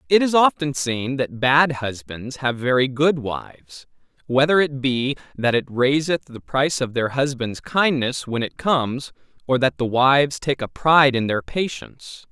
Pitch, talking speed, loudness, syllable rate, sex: 130 Hz, 175 wpm, -20 LUFS, 4.5 syllables/s, male